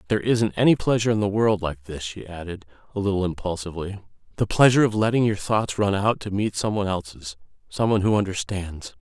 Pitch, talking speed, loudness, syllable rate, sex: 100 Hz, 205 wpm, -23 LUFS, 6.3 syllables/s, male